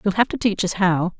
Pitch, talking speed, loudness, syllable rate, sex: 195 Hz, 300 wpm, -20 LUFS, 5.6 syllables/s, female